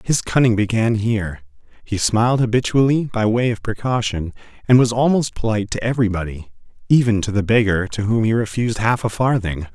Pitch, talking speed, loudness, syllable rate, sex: 110 Hz, 170 wpm, -18 LUFS, 5.8 syllables/s, male